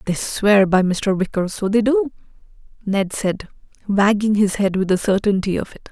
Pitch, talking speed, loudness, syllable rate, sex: 200 Hz, 180 wpm, -18 LUFS, 4.8 syllables/s, female